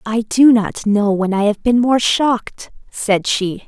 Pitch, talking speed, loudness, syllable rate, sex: 220 Hz, 195 wpm, -15 LUFS, 3.9 syllables/s, female